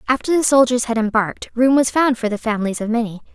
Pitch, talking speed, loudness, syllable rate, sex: 240 Hz, 235 wpm, -18 LUFS, 6.6 syllables/s, female